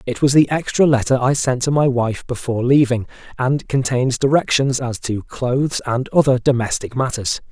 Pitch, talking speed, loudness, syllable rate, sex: 130 Hz, 175 wpm, -18 LUFS, 5.1 syllables/s, male